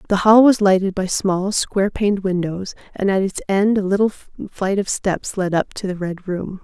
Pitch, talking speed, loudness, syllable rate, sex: 195 Hz, 215 wpm, -19 LUFS, 4.7 syllables/s, female